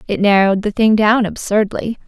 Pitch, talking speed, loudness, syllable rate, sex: 210 Hz, 175 wpm, -15 LUFS, 5.4 syllables/s, female